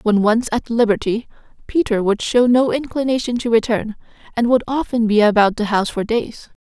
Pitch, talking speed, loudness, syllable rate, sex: 230 Hz, 180 wpm, -17 LUFS, 5.3 syllables/s, female